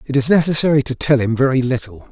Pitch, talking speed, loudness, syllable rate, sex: 130 Hz, 225 wpm, -16 LUFS, 6.5 syllables/s, male